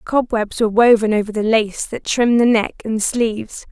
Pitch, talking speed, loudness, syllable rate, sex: 225 Hz, 195 wpm, -17 LUFS, 5.1 syllables/s, female